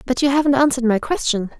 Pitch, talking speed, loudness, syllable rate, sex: 260 Hz, 225 wpm, -18 LUFS, 7.0 syllables/s, female